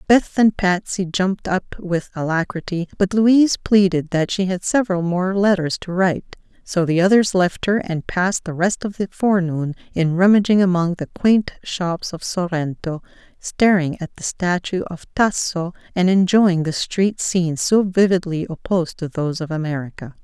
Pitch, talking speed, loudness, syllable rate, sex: 180 Hz, 165 wpm, -19 LUFS, 4.8 syllables/s, female